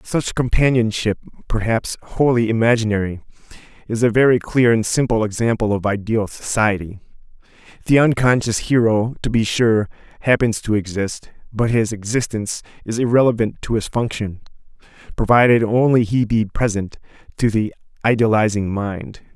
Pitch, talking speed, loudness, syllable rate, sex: 110 Hz, 125 wpm, -18 LUFS, 5.0 syllables/s, male